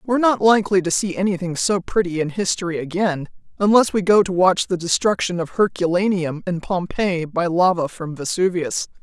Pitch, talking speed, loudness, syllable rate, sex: 185 Hz, 175 wpm, -19 LUFS, 5.3 syllables/s, female